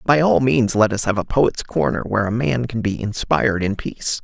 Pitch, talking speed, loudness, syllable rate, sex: 110 Hz, 240 wpm, -19 LUFS, 5.3 syllables/s, male